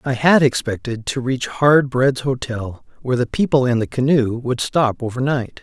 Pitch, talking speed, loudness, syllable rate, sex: 125 Hz, 180 wpm, -18 LUFS, 4.7 syllables/s, male